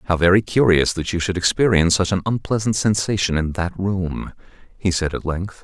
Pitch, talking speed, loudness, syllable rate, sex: 95 Hz, 190 wpm, -19 LUFS, 5.4 syllables/s, male